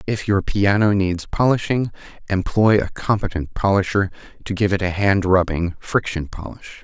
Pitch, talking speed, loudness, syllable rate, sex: 95 Hz, 150 wpm, -20 LUFS, 4.8 syllables/s, male